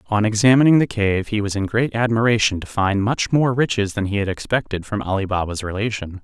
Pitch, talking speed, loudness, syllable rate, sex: 110 Hz, 210 wpm, -19 LUFS, 5.7 syllables/s, male